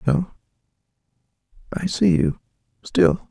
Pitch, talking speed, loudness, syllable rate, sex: 130 Hz, 55 wpm, -21 LUFS, 3.6 syllables/s, male